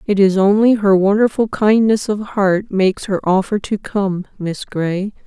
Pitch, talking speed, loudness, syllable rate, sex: 200 Hz, 170 wpm, -16 LUFS, 4.3 syllables/s, female